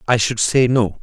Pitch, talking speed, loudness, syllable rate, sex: 115 Hz, 235 wpm, -16 LUFS, 4.7 syllables/s, male